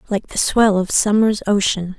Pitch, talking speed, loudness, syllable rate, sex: 205 Hz, 180 wpm, -17 LUFS, 4.6 syllables/s, female